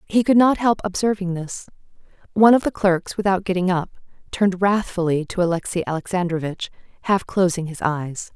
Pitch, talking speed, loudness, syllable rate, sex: 185 Hz, 160 wpm, -20 LUFS, 5.5 syllables/s, female